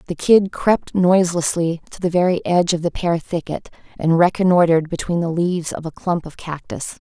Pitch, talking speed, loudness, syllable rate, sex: 170 Hz, 185 wpm, -19 LUFS, 5.3 syllables/s, female